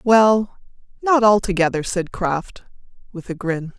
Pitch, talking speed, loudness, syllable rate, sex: 195 Hz, 125 wpm, -19 LUFS, 4.0 syllables/s, female